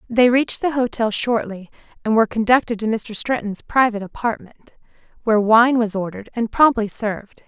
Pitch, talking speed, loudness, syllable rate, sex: 225 Hz, 160 wpm, -19 LUFS, 5.6 syllables/s, female